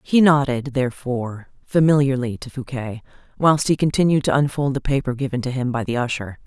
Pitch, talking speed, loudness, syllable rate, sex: 135 Hz, 175 wpm, -20 LUFS, 5.7 syllables/s, female